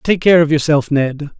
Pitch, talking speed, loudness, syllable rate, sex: 150 Hz, 215 wpm, -14 LUFS, 4.7 syllables/s, male